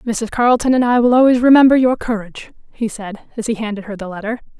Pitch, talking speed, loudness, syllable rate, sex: 230 Hz, 220 wpm, -15 LUFS, 6.5 syllables/s, female